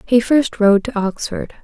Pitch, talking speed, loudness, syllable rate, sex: 225 Hz, 185 wpm, -16 LUFS, 4.3 syllables/s, female